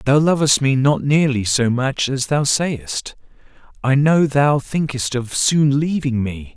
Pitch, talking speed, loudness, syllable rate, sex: 135 Hz, 165 wpm, -17 LUFS, 3.8 syllables/s, male